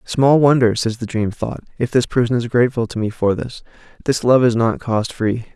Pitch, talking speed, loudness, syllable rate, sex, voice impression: 120 Hz, 215 wpm, -18 LUFS, 5.2 syllables/s, male, very masculine, adult-like, slightly thick, slightly tensed, slightly weak, slightly dark, soft, clear, fluent, slightly raspy, cool, intellectual, very refreshing, sincere, very calm, friendly, reassuring, slightly unique, slightly elegant, wild, slightly sweet, slightly lively, kind, very modest